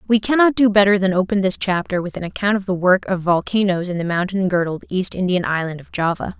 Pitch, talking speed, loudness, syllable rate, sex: 190 Hz, 235 wpm, -18 LUFS, 6.0 syllables/s, female